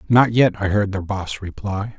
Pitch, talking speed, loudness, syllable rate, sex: 100 Hz, 210 wpm, -20 LUFS, 4.4 syllables/s, male